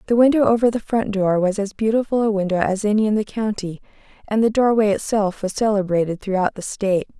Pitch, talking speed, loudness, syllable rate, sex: 210 Hz, 210 wpm, -19 LUFS, 6.1 syllables/s, female